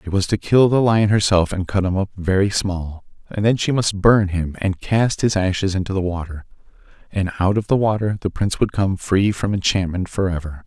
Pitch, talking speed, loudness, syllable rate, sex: 95 Hz, 220 wpm, -19 LUFS, 5.2 syllables/s, male